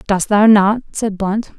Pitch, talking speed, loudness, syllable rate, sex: 210 Hz, 190 wpm, -14 LUFS, 3.8 syllables/s, female